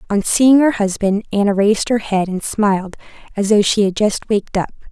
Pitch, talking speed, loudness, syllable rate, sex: 205 Hz, 205 wpm, -16 LUFS, 5.4 syllables/s, female